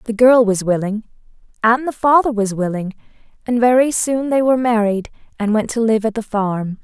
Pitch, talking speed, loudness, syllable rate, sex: 225 Hz, 195 wpm, -16 LUFS, 5.1 syllables/s, female